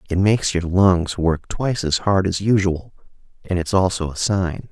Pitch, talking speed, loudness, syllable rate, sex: 90 Hz, 190 wpm, -19 LUFS, 4.7 syllables/s, male